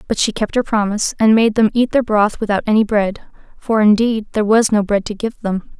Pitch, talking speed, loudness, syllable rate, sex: 215 Hz, 240 wpm, -16 LUFS, 5.7 syllables/s, female